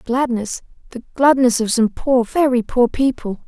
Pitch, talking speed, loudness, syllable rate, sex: 245 Hz, 155 wpm, -17 LUFS, 4.4 syllables/s, female